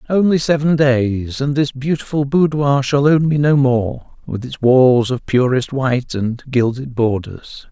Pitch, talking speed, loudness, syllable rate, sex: 135 Hz, 165 wpm, -16 LUFS, 4.2 syllables/s, male